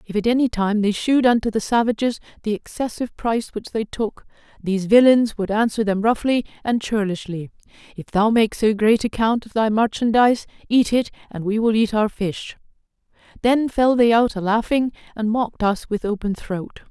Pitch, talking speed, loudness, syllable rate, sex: 220 Hz, 185 wpm, -20 LUFS, 5.6 syllables/s, female